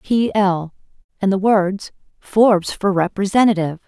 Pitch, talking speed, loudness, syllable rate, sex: 195 Hz, 125 wpm, -17 LUFS, 4.8 syllables/s, female